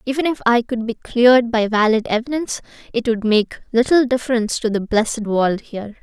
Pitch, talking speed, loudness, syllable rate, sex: 235 Hz, 190 wpm, -18 LUFS, 5.8 syllables/s, female